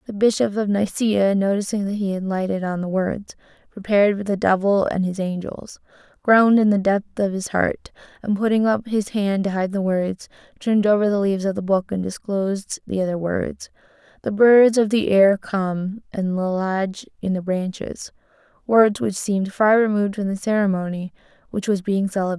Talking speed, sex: 190 wpm, female